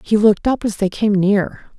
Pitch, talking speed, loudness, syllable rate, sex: 205 Hz, 235 wpm, -17 LUFS, 5.3 syllables/s, female